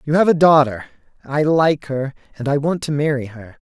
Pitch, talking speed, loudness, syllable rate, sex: 140 Hz, 180 wpm, -17 LUFS, 5.2 syllables/s, male